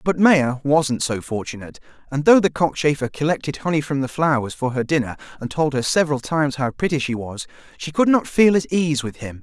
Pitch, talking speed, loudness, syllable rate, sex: 145 Hz, 215 wpm, -20 LUFS, 5.7 syllables/s, male